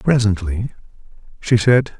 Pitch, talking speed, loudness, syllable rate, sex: 110 Hz, 90 wpm, -17 LUFS, 4.2 syllables/s, male